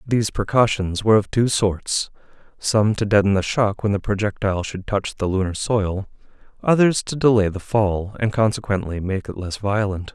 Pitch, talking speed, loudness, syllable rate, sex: 105 Hz, 175 wpm, -20 LUFS, 5.0 syllables/s, male